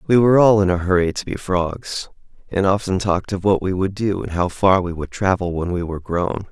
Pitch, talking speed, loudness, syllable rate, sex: 95 Hz, 250 wpm, -19 LUFS, 5.6 syllables/s, male